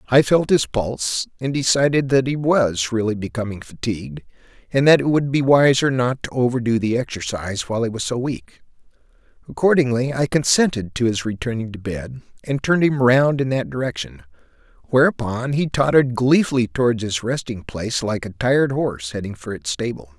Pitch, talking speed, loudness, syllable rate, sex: 120 Hz, 175 wpm, -20 LUFS, 5.5 syllables/s, male